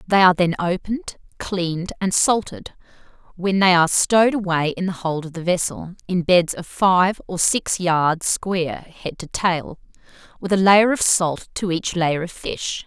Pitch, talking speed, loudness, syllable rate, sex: 180 Hz, 180 wpm, -19 LUFS, 4.5 syllables/s, female